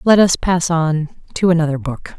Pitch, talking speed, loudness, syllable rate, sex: 165 Hz, 190 wpm, -16 LUFS, 4.7 syllables/s, female